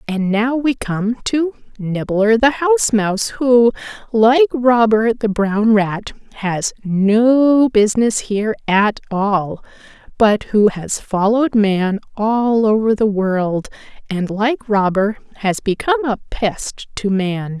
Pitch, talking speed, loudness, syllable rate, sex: 220 Hz, 135 wpm, -16 LUFS, 3.6 syllables/s, female